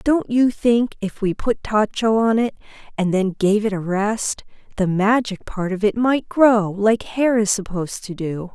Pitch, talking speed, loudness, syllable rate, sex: 210 Hz, 195 wpm, -19 LUFS, 4.2 syllables/s, female